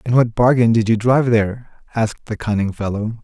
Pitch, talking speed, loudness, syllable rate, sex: 115 Hz, 205 wpm, -17 LUFS, 5.7 syllables/s, male